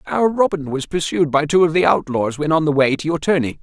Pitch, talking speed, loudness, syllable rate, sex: 155 Hz, 265 wpm, -18 LUFS, 5.7 syllables/s, male